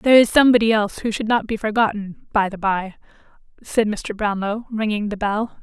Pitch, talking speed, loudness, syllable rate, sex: 215 Hz, 190 wpm, -20 LUFS, 5.6 syllables/s, female